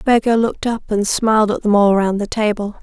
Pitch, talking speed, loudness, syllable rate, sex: 215 Hz, 235 wpm, -16 LUFS, 5.6 syllables/s, female